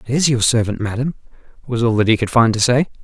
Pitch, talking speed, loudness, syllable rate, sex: 120 Hz, 255 wpm, -17 LUFS, 7.2 syllables/s, male